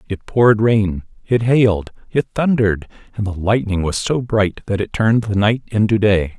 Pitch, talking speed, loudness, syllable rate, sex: 105 Hz, 190 wpm, -17 LUFS, 5.1 syllables/s, male